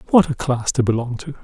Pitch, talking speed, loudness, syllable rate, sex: 130 Hz, 250 wpm, -19 LUFS, 6.1 syllables/s, male